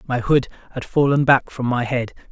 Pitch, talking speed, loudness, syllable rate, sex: 130 Hz, 210 wpm, -19 LUFS, 5.1 syllables/s, male